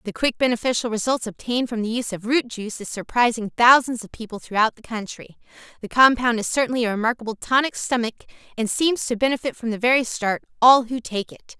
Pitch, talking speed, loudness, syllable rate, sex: 235 Hz, 200 wpm, -21 LUFS, 6.3 syllables/s, female